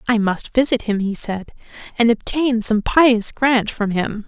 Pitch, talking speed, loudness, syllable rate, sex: 225 Hz, 180 wpm, -18 LUFS, 4.1 syllables/s, female